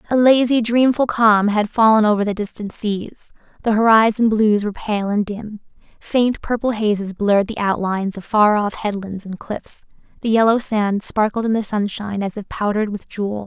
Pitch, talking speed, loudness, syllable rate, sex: 215 Hz, 185 wpm, -18 LUFS, 5.1 syllables/s, female